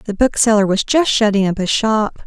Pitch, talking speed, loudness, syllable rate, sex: 215 Hz, 210 wpm, -15 LUFS, 4.9 syllables/s, female